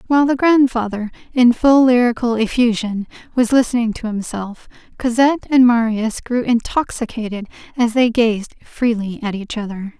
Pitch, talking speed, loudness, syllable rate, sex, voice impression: 235 Hz, 140 wpm, -17 LUFS, 4.9 syllables/s, female, feminine, adult-like, relaxed, bright, soft, clear, slightly raspy, intellectual, friendly, reassuring, elegant, slightly lively, kind